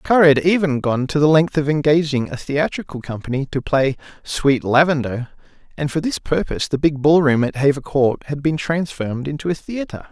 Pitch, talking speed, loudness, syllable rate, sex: 145 Hz, 190 wpm, -19 LUFS, 5.4 syllables/s, male